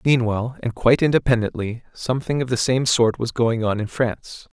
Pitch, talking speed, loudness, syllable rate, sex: 120 Hz, 185 wpm, -21 LUFS, 5.6 syllables/s, male